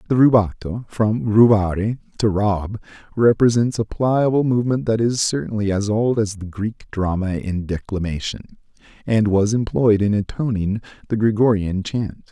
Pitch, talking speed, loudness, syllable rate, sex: 105 Hz, 140 wpm, -19 LUFS, 4.7 syllables/s, male